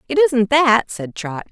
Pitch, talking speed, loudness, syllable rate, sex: 240 Hz, 200 wpm, -16 LUFS, 3.9 syllables/s, female